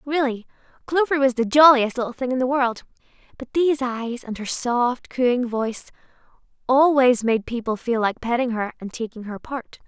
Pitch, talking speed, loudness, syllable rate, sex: 250 Hz, 175 wpm, -21 LUFS, 4.9 syllables/s, female